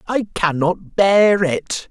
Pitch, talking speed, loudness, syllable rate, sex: 185 Hz, 125 wpm, -17 LUFS, 2.9 syllables/s, male